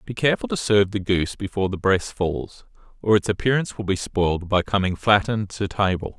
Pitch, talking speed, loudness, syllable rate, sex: 100 Hz, 205 wpm, -22 LUFS, 6.1 syllables/s, male